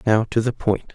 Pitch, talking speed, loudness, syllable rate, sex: 110 Hz, 255 wpm, -21 LUFS, 4.9 syllables/s, male